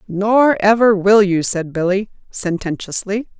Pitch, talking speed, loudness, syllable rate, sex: 200 Hz, 125 wpm, -16 LUFS, 4.0 syllables/s, female